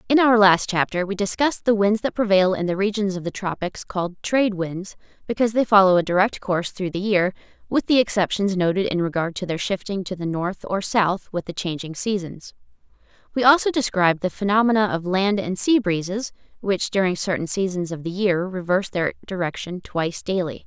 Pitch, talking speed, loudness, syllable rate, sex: 195 Hz, 195 wpm, -21 LUFS, 5.6 syllables/s, female